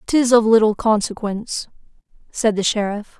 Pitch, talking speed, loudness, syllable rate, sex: 215 Hz, 130 wpm, -18 LUFS, 4.9 syllables/s, female